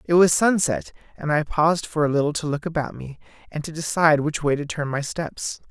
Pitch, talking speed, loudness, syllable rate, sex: 155 Hz, 230 wpm, -22 LUFS, 5.6 syllables/s, male